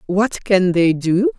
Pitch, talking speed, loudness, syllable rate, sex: 200 Hz, 175 wpm, -16 LUFS, 3.4 syllables/s, female